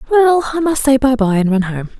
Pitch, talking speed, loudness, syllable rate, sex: 255 Hz, 270 wpm, -14 LUFS, 5.6 syllables/s, female